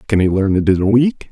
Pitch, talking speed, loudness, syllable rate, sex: 105 Hz, 320 wpm, -14 LUFS, 6.3 syllables/s, male